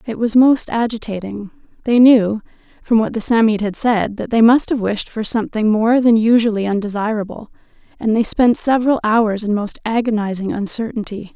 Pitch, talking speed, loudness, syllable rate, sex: 220 Hz, 170 wpm, -16 LUFS, 5.2 syllables/s, female